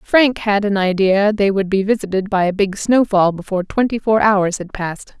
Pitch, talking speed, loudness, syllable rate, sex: 200 Hz, 210 wpm, -16 LUFS, 5.2 syllables/s, female